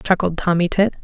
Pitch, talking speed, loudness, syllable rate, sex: 180 Hz, 175 wpm, -18 LUFS, 5.6 syllables/s, female